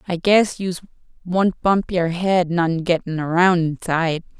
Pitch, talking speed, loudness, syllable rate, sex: 175 Hz, 150 wpm, -19 LUFS, 4.4 syllables/s, female